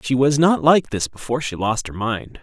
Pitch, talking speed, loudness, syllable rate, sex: 130 Hz, 250 wpm, -19 LUFS, 5.2 syllables/s, male